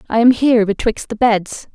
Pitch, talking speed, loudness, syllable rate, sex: 225 Hz, 205 wpm, -15 LUFS, 5.2 syllables/s, female